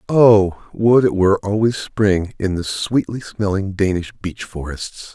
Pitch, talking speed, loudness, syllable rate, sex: 100 Hz, 150 wpm, -18 LUFS, 4.0 syllables/s, male